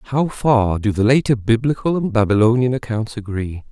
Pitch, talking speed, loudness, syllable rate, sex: 115 Hz, 160 wpm, -18 LUFS, 5.0 syllables/s, male